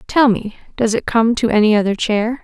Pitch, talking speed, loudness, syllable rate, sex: 225 Hz, 220 wpm, -16 LUFS, 5.3 syllables/s, female